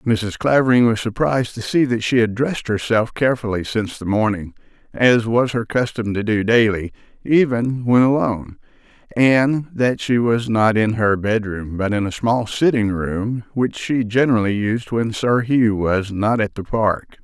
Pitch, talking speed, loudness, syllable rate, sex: 115 Hz, 180 wpm, -18 LUFS, 4.6 syllables/s, male